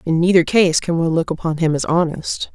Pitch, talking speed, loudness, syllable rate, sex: 165 Hz, 235 wpm, -17 LUFS, 5.8 syllables/s, female